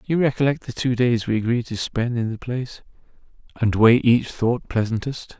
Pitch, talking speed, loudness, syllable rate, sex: 120 Hz, 190 wpm, -21 LUFS, 5.0 syllables/s, male